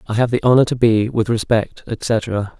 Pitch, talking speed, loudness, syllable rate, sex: 115 Hz, 210 wpm, -17 LUFS, 4.6 syllables/s, male